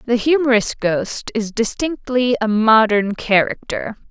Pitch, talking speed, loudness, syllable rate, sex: 230 Hz, 115 wpm, -17 LUFS, 4.0 syllables/s, female